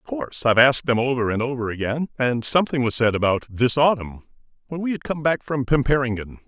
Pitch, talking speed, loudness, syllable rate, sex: 130 Hz, 215 wpm, -21 LUFS, 6.3 syllables/s, male